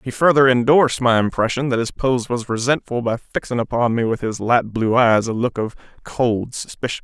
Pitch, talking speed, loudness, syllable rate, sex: 120 Hz, 205 wpm, -19 LUFS, 5.3 syllables/s, male